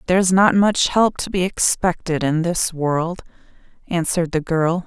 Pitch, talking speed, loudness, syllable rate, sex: 175 Hz, 160 wpm, -19 LUFS, 4.4 syllables/s, female